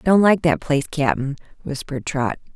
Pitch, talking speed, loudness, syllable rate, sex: 150 Hz, 165 wpm, -21 LUFS, 5.1 syllables/s, female